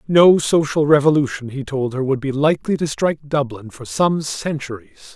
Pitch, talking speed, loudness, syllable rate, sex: 145 Hz, 175 wpm, -18 LUFS, 5.3 syllables/s, male